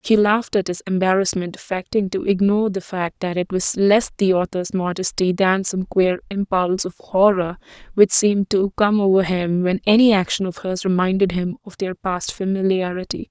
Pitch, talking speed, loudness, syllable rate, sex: 190 Hz, 180 wpm, -19 LUFS, 5.2 syllables/s, female